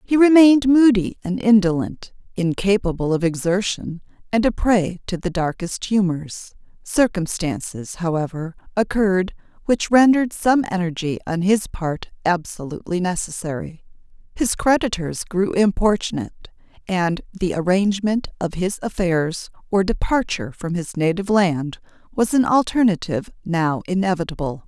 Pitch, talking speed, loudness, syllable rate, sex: 190 Hz, 115 wpm, -20 LUFS, 4.8 syllables/s, female